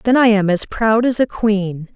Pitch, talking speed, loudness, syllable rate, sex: 215 Hz, 245 wpm, -16 LUFS, 4.4 syllables/s, female